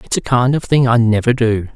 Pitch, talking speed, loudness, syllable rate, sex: 120 Hz, 275 wpm, -14 LUFS, 5.6 syllables/s, male